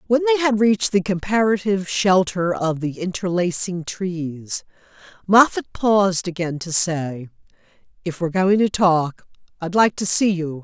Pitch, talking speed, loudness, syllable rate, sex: 185 Hz, 145 wpm, -20 LUFS, 4.5 syllables/s, female